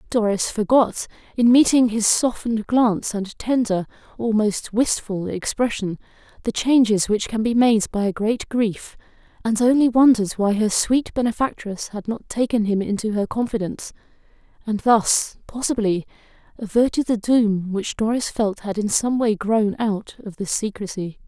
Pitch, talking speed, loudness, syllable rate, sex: 220 Hz, 150 wpm, -20 LUFS, 4.7 syllables/s, female